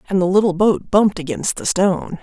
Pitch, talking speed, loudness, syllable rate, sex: 190 Hz, 215 wpm, -17 LUFS, 5.9 syllables/s, female